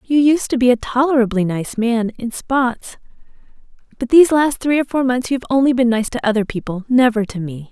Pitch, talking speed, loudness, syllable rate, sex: 245 Hz, 210 wpm, -17 LUFS, 5.6 syllables/s, female